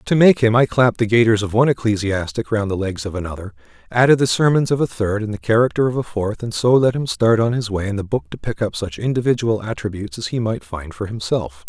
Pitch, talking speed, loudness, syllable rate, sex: 110 Hz, 255 wpm, -19 LUFS, 6.2 syllables/s, male